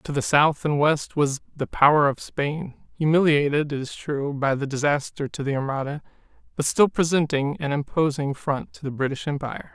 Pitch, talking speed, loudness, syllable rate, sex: 145 Hz, 185 wpm, -23 LUFS, 5.1 syllables/s, male